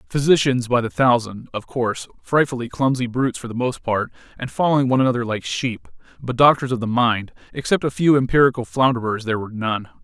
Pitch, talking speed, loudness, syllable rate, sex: 125 Hz, 180 wpm, -20 LUFS, 6.2 syllables/s, male